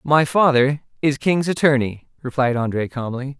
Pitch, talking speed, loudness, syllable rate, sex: 135 Hz, 140 wpm, -19 LUFS, 4.7 syllables/s, male